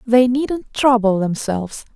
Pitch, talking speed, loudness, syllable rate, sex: 235 Hz, 125 wpm, -17 LUFS, 4.0 syllables/s, female